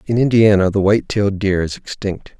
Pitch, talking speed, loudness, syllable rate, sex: 100 Hz, 200 wpm, -16 LUFS, 5.7 syllables/s, male